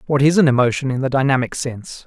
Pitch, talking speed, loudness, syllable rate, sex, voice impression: 135 Hz, 235 wpm, -17 LUFS, 6.8 syllables/s, male, very masculine, middle-aged, thick, slightly tensed, powerful, slightly bright, soft, clear, slightly fluent, slightly raspy, slightly cool, intellectual, refreshing, sincere, calm, slightly mature, friendly, reassuring, slightly unique, slightly elegant, slightly wild, slightly sweet, lively, kind, slightly intense